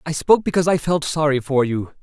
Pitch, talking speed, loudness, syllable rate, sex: 150 Hz, 235 wpm, -19 LUFS, 6.5 syllables/s, male